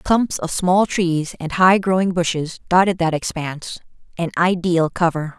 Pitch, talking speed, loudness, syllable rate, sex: 175 Hz, 155 wpm, -19 LUFS, 4.4 syllables/s, female